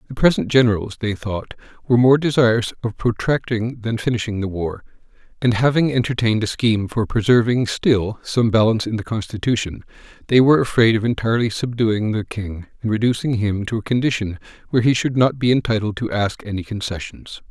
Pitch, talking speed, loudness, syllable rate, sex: 115 Hz, 175 wpm, -19 LUFS, 5.8 syllables/s, male